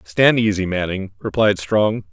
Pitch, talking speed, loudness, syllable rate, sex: 105 Hz, 140 wpm, -18 LUFS, 4.2 syllables/s, male